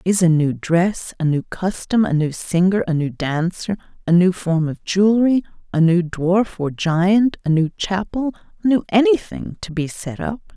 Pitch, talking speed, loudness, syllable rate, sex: 180 Hz, 190 wpm, -19 LUFS, 4.5 syllables/s, female